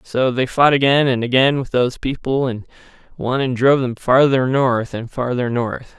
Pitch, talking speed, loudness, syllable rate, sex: 125 Hz, 190 wpm, -17 LUFS, 4.8 syllables/s, male